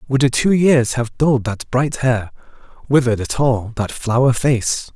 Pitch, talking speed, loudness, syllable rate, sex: 125 Hz, 180 wpm, -17 LUFS, 4.4 syllables/s, male